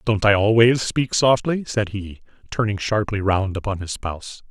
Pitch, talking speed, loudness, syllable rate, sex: 105 Hz, 175 wpm, -20 LUFS, 4.7 syllables/s, male